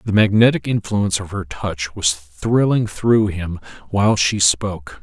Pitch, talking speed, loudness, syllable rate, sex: 100 Hz, 155 wpm, -18 LUFS, 4.4 syllables/s, male